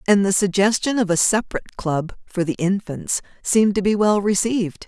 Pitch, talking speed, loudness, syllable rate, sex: 195 Hz, 185 wpm, -20 LUFS, 5.6 syllables/s, female